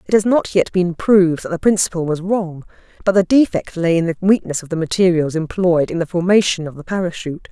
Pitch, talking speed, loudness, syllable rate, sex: 175 Hz, 225 wpm, -17 LUFS, 5.9 syllables/s, female